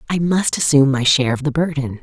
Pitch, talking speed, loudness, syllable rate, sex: 145 Hz, 235 wpm, -16 LUFS, 6.7 syllables/s, female